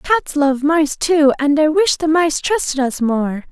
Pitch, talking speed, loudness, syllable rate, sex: 300 Hz, 205 wpm, -16 LUFS, 3.9 syllables/s, female